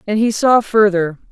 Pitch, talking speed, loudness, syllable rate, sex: 210 Hz, 185 wpm, -14 LUFS, 4.7 syllables/s, female